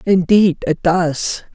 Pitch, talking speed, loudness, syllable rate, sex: 175 Hz, 115 wpm, -15 LUFS, 3.2 syllables/s, female